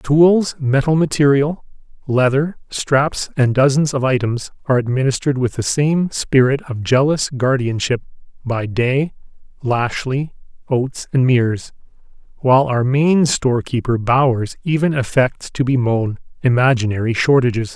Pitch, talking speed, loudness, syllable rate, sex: 130 Hz, 120 wpm, -17 LUFS, 4.6 syllables/s, male